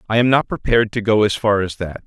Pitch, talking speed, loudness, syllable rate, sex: 110 Hz, 290 wpm, -17 LUFS, 6.4 syllables/s, male